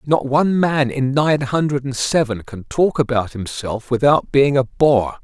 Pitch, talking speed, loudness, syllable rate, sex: 135 Hz, 185 wpm, -18 LUFS, 4.4 syllables/s, male